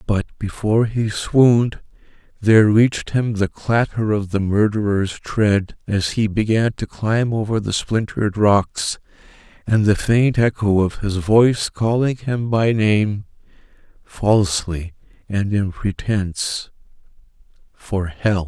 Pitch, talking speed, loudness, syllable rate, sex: 105 Hz, 120 wpm, -19 LUFS, 3.9 syllables/s, male